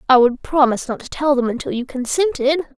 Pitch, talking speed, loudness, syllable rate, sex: 270 Hz, 215 wpm, -18 LUFS, 6.1 syllables/s, female